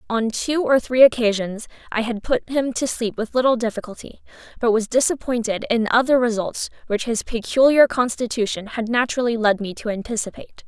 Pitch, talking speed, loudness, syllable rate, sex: 235 Hz, 170 wpm, -20 LUFS, 5.5 syllables/s, female